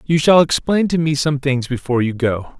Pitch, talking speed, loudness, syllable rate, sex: 145 Hz, 230 wpm, -17 LUFS, 5.3 syllables/s, male